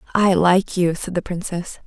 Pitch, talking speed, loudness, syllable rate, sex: 185 Hz, 195 wpm, -20 LUFS, 4.6 syllables/s, female